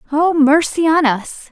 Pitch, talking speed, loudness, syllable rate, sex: 300 Hz, 160 wpm, -14 LUFS, 4.0 syllables/s, female